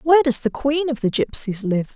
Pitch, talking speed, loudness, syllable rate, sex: 260 Hz, 245 wpm, -20 LUFS, 5.2 syllables/s, female